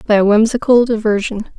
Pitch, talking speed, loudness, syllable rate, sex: 220 Hz, 150 wpm, -14 LUFS, 5.7 syllables/s, female